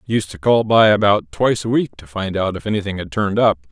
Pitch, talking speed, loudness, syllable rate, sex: 100 Hz, 260 wpm, -17 LUFS, 6.1 syllables/s, male